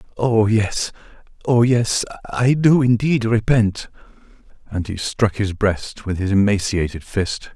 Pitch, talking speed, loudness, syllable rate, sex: 110 Hz, 135 wpm, -19 LUFS, 3.9 syllables/s, male